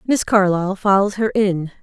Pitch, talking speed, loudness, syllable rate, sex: 205 Hz, 165 wpm, -17 LUFS, 5.7 syllables/s, female